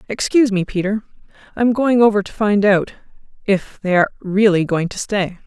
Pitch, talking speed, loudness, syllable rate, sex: 205 Hz, 175 wpm, -17 LUFS, 5.5 syllables/s, female